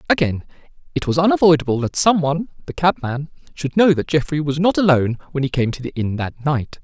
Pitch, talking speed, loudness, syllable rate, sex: 150 Hz, 195 wpm, -18 LUFS, 6.1 syllables/s, male